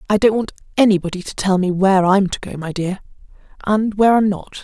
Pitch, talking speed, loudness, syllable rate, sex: 195 Hz, 220 wpm, -17 LUFS, 6.1 syllables/s, female